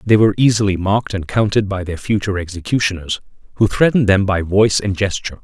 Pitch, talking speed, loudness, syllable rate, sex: 100 Hz, 190 wpm, -17 LUFS, 6.8 syllables/s, male